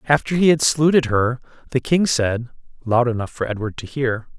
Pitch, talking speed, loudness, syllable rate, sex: 130 Hz, 190 wpm, -19 LUFS, 5.5 syllables/s, male